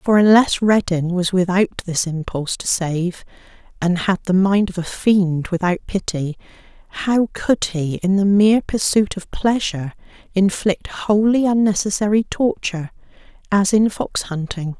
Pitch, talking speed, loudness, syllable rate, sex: 190 Hz, 140 wpm, -18 LUFS, 4.5 syllables/s, female